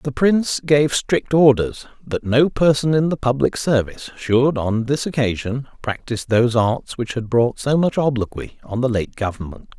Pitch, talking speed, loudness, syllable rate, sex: 125 Hz, 180 wpm, -19 LUFS, 4.8 syllables/s, male